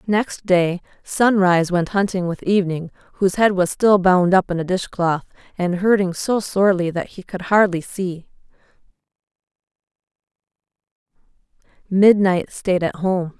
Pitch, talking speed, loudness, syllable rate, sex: 185 Hz, 130 wpm, -18 LUFS, 4.6 syllables/s, female